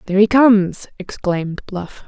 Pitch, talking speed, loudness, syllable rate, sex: 195 Hz, 145 wpm, -16 LUFS, 5.1 syllables/s, female